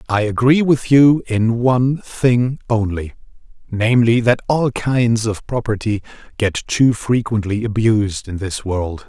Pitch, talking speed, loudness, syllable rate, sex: 115 Hz, 140 wpm, -17 LUFS, 4.1 syllables/s, male